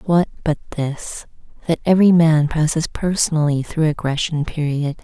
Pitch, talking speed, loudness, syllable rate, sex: 155 Hz, 145 wpm, -18 LUFS, 4.9 syllables/s, female